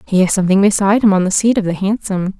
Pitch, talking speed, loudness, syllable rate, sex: 200 Hz, 275 wpm, -14 LUFS, 7.1 syllables/s, female